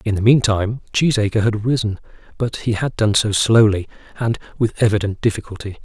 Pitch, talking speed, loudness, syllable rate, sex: 110 Hz, 165 wpm, -18 LUFS, 5.8 syllables/s, male